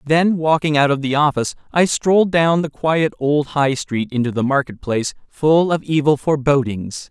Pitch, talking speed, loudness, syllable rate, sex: 145 Hz, 185 wpm, -17 LUFS, 5.0 syllables/s, male